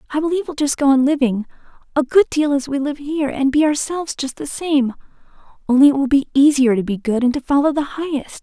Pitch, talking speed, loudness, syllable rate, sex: 280 Hz, 215 wpm, -18 LUFS, 6.3 syllables/s, female